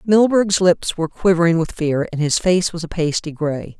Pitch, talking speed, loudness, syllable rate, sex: 170 Hz, 205 wpm, -18 LUFS, 4.9 syllables/s, female